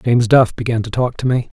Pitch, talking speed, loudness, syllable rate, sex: 120 Hz, 265 wpm, -16 LUFS, 6.0 syllables/s, male